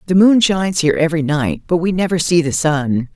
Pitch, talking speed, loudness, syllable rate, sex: 165 Hz, 230 wpm, -15 LUFS, 5.9 syllables/s, female